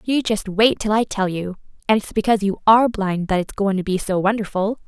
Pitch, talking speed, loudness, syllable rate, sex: 205 Hz, 245 wpm, -19 LUFS, 5.7 syllables/s, female